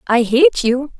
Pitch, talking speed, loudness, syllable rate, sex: 270 Hz, 180 wpm, -14 LUFS, 3.7 syllables/s, female